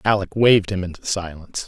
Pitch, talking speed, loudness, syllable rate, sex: 95 Hz, 180 wpm, -20 LUFS, 6.4 syllables/s, male